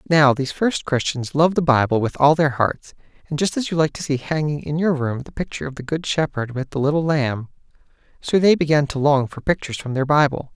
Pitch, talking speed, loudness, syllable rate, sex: 145 Hz, 240 wpm, -20 LUFS, 5.9 syllables/s, male